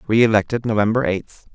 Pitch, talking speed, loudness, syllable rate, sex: 110 Hz, 115 wpm, -19 LUFS, 5.1 syllables/s, male